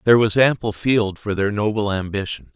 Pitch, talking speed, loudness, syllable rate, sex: 105 Hz, 190 wpm, -20 LUFS, 5.4 syllables/s, male